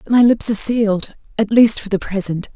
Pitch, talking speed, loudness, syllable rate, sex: 210 Hz, 210 wpm, -16 LUFS, 5.8 syllables/s, female